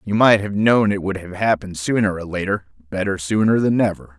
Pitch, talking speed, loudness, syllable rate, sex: 100 Hz, 215 wpm, -19 LUFS, 5.7 syllables/s, male